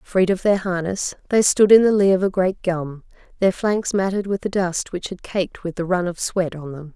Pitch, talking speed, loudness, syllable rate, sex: 185 Hz, 250 wpm, -20 LUFS, 5.1 syllables/s, female